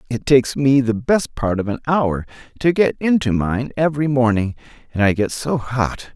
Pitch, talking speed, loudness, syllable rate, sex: 125 Hz, 195 wpm, -18 LUFS, 4.9 syllables/s, male